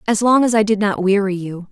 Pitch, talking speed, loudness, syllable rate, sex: 205 Hz, 280 wpm, -16 LUFS, 5.8 syllables/s, female